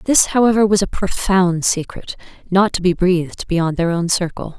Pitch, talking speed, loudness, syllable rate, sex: 185 Hz, 185 wpm, -17 LUFS, 4.7 syllables/s, female